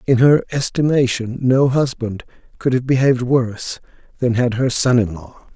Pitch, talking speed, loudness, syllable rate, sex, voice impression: 125 Hz, 160 wpm, -17 LUFS, 4.8 syllables/s, male, masculine, middle-aged, slightly thick, slightly intellectual, calm, slightly friendly, slightly reassuring